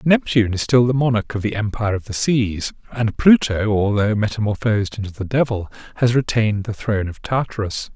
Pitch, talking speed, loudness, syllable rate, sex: 110 Hz, 180 wpm, -19 LUFS, 4.5 syllables/s, male